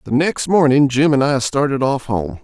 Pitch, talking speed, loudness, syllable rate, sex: 135 Hz, 220 wpm, -16 LUFS, 4.8 syllables/s, male